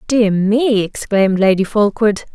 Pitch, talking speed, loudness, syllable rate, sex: 210 Hz, 130 wpm, -15 LUFS, 4.7 syllables/s, female